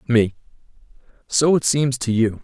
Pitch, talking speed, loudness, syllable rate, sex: 125 Hz, 150 wpm, -19 LUFS, 4.6 syllables/s, male